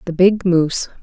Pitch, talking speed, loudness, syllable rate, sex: 175 Hz, 175 wpm, -16 LUFS, 5.1 syllables/s, female